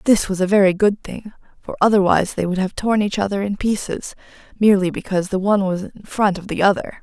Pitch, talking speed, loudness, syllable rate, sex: 195 Hz, 220 wpm, -18 LUFS, 6.1 syllables/s, female